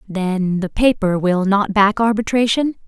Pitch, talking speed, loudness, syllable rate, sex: 205 Hz, 145 wpm, -17 LUFS, 4.2 syllables/s, female